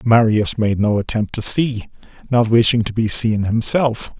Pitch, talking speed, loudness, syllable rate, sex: 110 Hz, 170 wpm, -17 LUFS, 4.4 syllables/s, male